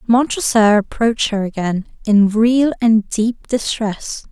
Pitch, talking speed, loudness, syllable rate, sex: 220 Hz, 125 wpm, -16 LUFS, 3.9 syllables/s, female